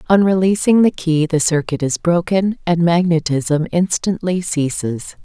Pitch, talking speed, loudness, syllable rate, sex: 170 Hz, 135 wpm, -16 LUFS, 4.2 syllables/s, female